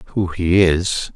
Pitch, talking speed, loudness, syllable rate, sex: 90 Hz, 155 wpm, -17 LUFS, 2.7 syllables/s, male